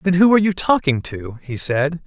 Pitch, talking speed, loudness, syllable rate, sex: 160 Hz, 230 wpm, -18 LUFS, 5.3 syllables/s, male